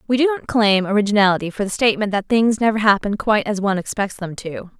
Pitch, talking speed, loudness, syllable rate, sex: 210 Hz, 225 wpm, -18 LUFS, 6.6 syllables/s, female